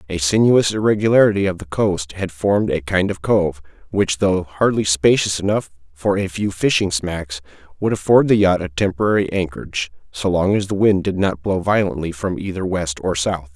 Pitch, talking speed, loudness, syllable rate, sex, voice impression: 90 Hz, 190 wpm, -18 LUFS, 5.2 syllables/s, male, very masculine, adult-like, thick, cool, slightly intellectual, calm, slightly wild